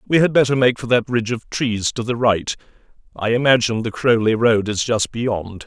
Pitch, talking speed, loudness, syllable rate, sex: 115 Hz, 210 wpm, -18 LUFS, 5.3 syllables/s, male